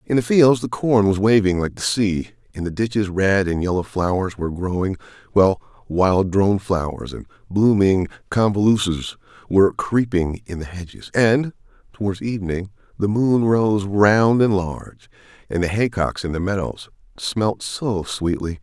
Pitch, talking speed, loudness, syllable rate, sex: 100 Hz, 160 wpm, -20 LUFS, 4.7 syllables/s, male